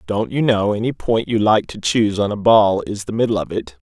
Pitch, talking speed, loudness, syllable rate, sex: 105 Hz, 265 wpm, -18 LUFS, 5.5 syllables/s, male